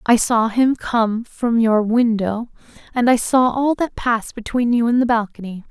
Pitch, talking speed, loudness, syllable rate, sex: 230 Hz, 190 wpm, -18 LUFS, 4.5 syllables/s, female